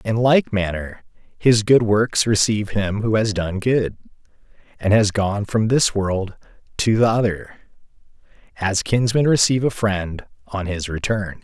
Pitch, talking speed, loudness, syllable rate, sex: 105 Hz, 145 wpm, -19 LUFS, 4.2 syllables/s, male